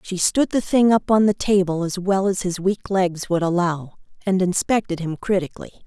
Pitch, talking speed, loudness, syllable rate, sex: 190 Hz, 205 wpm, -20 LUFS, 5.1 syllables/s, female